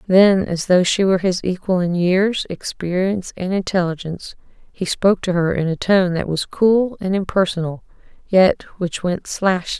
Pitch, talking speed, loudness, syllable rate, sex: 185 Hz, 170 wpm, -18 LUFS, 4.8 syllables/s, female